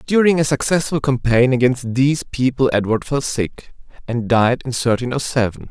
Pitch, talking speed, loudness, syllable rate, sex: 130 Hz, 170 wpm, -18 LUFS, 5.0 syllables/s, male